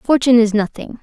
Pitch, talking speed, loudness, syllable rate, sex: 235 Hz, 175 wpm, -14 LUFS, 6.1 syllables/s, female